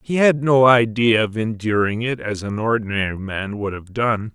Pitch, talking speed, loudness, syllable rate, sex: 110 Hz, 195 wpm, -19 LUFS, 4.7 syllables/s, male